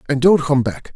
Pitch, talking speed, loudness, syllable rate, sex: 140 Hz, 250 wpm, -16 LUFS, 5.2 syllables/s, male